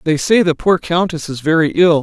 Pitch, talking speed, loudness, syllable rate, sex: 165 Hz, 235 wpm, -15 LUFS, 5.2 syllables/s, male